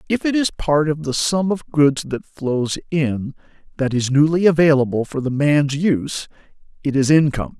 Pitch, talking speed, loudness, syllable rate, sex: 150 Hz, 180 wpm, -18 LUFS, 4.8 syllables/s, male